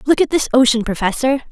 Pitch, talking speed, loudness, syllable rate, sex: 255 Hz, 200 wpm, -16 LUFS, 6.3 syllables/s, female